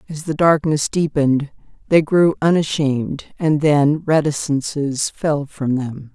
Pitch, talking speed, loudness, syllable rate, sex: 150 Hz, 125 wpm, -18 LUFS, 4.0 syllables/s, female